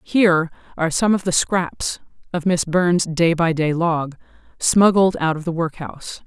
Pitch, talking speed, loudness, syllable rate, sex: 170 Hz, 170 wpm, -19 LUFS, 4.5 syllables/s, female